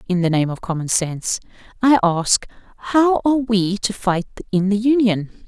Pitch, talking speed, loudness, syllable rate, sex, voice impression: 205 Hz, 175 wpm, -19 LUFS, 5.0 syllables/s, female, very feminine, middle-aged, thin, slightly tensed, slightly weak, slightly bright, soft, very clear, fluent, cute, intellectual, refreshing, sincere, very calm, very friendly, reassuring, slightly unique, very elegant, sweet, lively, very kind, modest, light